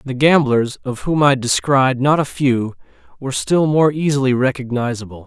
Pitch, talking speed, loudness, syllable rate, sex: 135 Hz, 160 wpm, -16 LUFS, 4.9 syllables/s, male